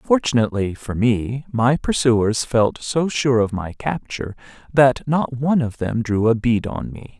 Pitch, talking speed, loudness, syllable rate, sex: 120 Hz, 175 wpm, -20 LUFS, 4.3 syllables/s, male